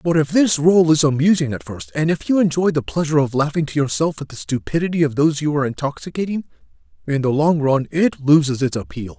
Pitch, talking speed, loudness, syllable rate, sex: 145 Hz, 220 wpm, -18 LUFS, 6.2 syllables/s, male